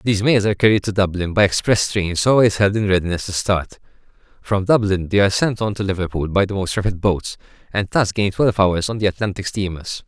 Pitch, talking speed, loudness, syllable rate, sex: 100 Hz, 220 wpm, -18 LUFS, 6.1 syllables/s, male